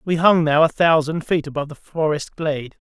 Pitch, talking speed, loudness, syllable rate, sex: 155 Hz, 210 wpm, -19 LUFS, 5.6 syllables/s, male